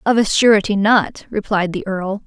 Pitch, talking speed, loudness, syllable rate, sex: 205 Hz, 185 wpm, -16 LUFS, 4.8 syllables/s, female